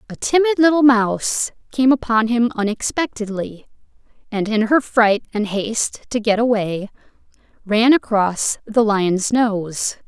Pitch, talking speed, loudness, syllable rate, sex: 225 Hz, 130 wpm, -18 LUFS, 4.2 syllables/s, female